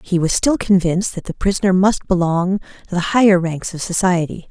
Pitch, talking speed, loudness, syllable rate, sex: 185 Hz, 200 wpm, -17 LUFS, 5.6 syllables/s, female